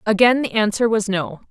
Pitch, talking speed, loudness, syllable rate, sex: 215 Hz, 200 wpm, -18 LUFS, 5.3 syllables/s, female